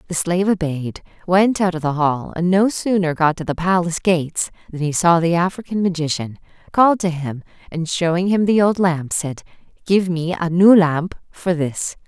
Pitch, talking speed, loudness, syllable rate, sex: 175 Hz, 195 wpm, -18 LUFS, 5.0 syllables/s, female